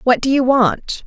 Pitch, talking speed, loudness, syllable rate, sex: 250 Hz, 225 wpm, -15 LUFS, 4.1 syllables/s, female